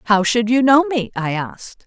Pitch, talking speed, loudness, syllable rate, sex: 225 Hz, 225 wpm, -17 LUFS, 4.9 syllables/s, female